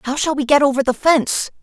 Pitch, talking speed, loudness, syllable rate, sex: 275 Hz, 260 wpm, -16 LUFS, 6.0 syllables/s, female